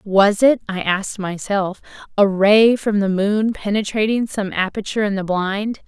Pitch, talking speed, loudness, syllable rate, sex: 205 Hz, 165 wpm, -18 LUFS, 4.5 syllables/s, female